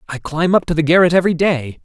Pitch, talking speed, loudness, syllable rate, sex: 165 Hz, 260 wpm, -15 LUFS, 6.7 syllables/s, male